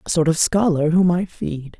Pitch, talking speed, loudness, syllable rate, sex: 170 Hz, 235 wpm, -19 LUFS, 4.9 syllables/s, male